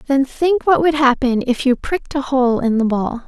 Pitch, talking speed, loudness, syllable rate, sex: 265 Hz, 240 wpm, -17 LUFS, 4.9 syllables/s, female